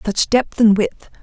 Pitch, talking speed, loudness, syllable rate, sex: 220 Hz, 195 wpm, -16 LUFS, 4.0 syllables/s, female